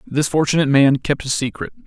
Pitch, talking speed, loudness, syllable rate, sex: 145 Hz, 195 wpm, -17 LUFS, 6.1 syllables/s, male